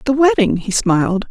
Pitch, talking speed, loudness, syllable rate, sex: 235 Hz, 185 wpm, -15 LUFS, 5.1 syllables/s, female